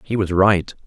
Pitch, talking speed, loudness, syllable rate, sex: 95 Hz, 205 wpm, -18 LUFS, 4.4 syllables/s, male